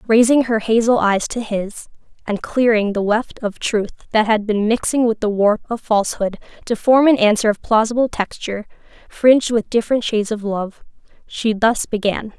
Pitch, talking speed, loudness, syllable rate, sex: 220 Hz, 180 wpm, -17 LUFS, 5.1 syllables/s, female